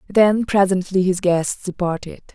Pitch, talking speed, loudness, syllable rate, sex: 190 Hz, 130 wpm, -19 LUFS, 4.4 syllables/s, female